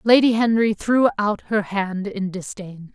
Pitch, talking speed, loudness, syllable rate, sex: 205 Hz, 165 wpm, -20 LUFS, 4.6 syllables/s, female